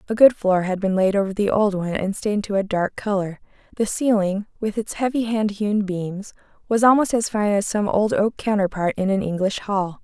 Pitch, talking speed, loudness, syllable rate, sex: 205 Hz, 220 wpm, -21 LUFS, 5.3 syllables/s, female